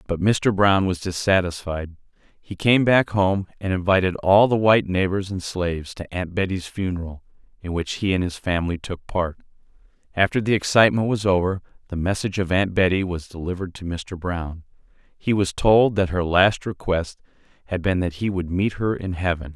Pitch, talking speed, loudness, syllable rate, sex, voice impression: 95 Hz, 185 wpm, -22 LUFS, 5.2 syllables/s, male, masculine, adult-like, tensed, powerful, bright, clear, cool, calm, mature, friendly, wild, lively, slightly kind